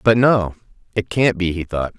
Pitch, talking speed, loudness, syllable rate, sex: 100 Hz, 210 wpm, -19 LUFS, 4.8 syllables/s, male